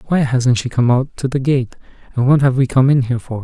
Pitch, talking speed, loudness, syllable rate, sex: 130 Hz, 280 wpm, -15 LUFS, 5.9 syllables/s, male